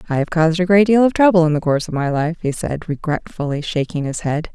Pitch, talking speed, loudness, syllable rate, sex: 165 Hz, 265 wpm, -17 LUFS, 6.3 syllables/s, female